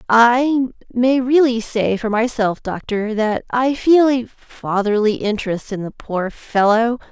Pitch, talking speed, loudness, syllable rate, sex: 230 Hz, 145 wpm, -17 LUFS, 3.8 syllables/s, female